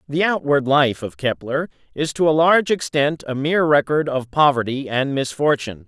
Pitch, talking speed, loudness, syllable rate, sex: 145 Hz, 175 wpm, -19 LUFS, 5.2 syllables/s, male